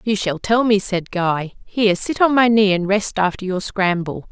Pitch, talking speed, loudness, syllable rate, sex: 200 Hz, 220 wpm, -18 LUFS, 4.7 syllables/s, female